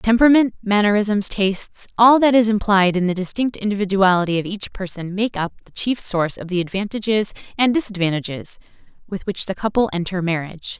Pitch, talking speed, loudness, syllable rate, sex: 200 Hz, 155 wpm, -19 LUFS, 5.7 syllables/s, female